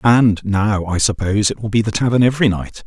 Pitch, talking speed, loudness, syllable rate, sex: 105 Hz, 230 wpm, -16 LUFS, 5.9 syllables/s, male